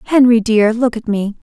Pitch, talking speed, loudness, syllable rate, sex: 230 Hz, 195 wpm, -14 LUFS, 4.9 syllables/s, female